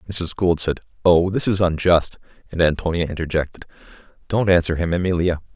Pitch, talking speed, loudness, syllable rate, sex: 85 Hz, 150 wpm, -20 LUFS, 5.9 syllables/s, male